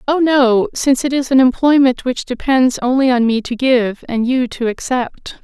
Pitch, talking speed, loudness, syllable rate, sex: 255 Hz, 200 wpm, -15 LUFS, 4.6 syllables/s, female